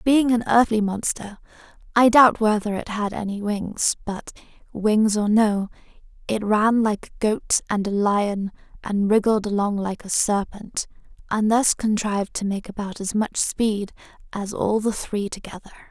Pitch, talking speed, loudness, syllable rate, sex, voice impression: 210 Hz, 160 wpm, -22 LUFS, 4.4 syllables/s, female, feminine, young, relaxed, weak, bright, soft, raspy, calm, slightly friendly, kind, modest